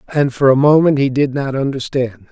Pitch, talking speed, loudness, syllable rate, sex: 135 Hz, 205 wpm, -15 LUFS, 5.5 syllables/s, male